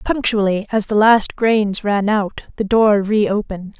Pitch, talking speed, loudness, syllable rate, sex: 210 Hz, 160 wpm, -16 LUFS, 4.0 syllables/s, female